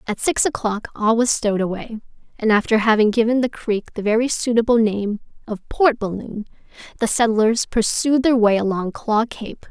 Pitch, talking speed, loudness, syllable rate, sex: 225 Hz, 175 wpm, -19 LUFS, 4.9 syllables/s, female